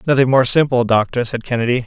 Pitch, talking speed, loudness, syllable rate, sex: 125 Hz, 195 wpm, -16 LUFS, 6.4 syllables/s, male